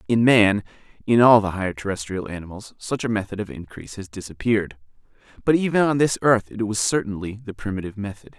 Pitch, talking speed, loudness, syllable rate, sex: 105 Hz, 185 wpm, -21 LUFS, 6.3 syllables/s, male